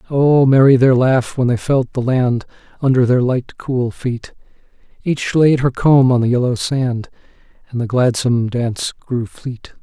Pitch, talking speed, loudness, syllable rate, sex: 125 Hz, 170 wpm, -16 LUFS, 4.4 syllables/s, male